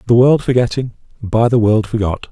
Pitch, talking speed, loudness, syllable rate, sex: 115 Hz, 180 wpm, -14 LUFS, 5.4 syllables/s, male